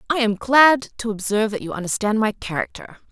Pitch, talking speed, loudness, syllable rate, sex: 220 Hz, 195 wpm, -19 LUFS, 5.8 syllables/s, female